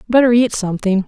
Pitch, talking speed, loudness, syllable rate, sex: 215 Hz, 170 wpm, -15 LUFS, 6.7 syllables/s, female